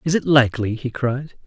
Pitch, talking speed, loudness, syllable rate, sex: 130 Hz, 205 wpm, -20 LUFS, 5.3 syllables/s, male